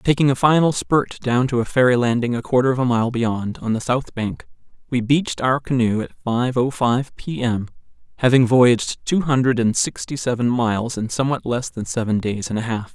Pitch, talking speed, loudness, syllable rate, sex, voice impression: 125 Hz, 215 wpm, -20 LUFS, 5.2 syllables/s, male, masculine, adult-like, slightly tensed, powerful, slightly muffled, slightly raspy, cool, slightly intellectual, slightly refreshing, friendly, reassuring, slightly wild, lively, kind, slightly light